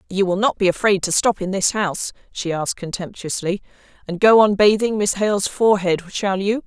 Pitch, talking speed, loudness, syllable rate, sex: 195 Hz, 200 wpm, -19 LUFS, 5.6 syllables/s, female